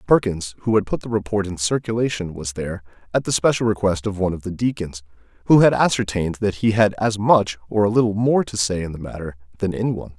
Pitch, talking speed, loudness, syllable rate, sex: 100 Hz, 230 wpm, -20 LUFS, 6.3 syllables/s, male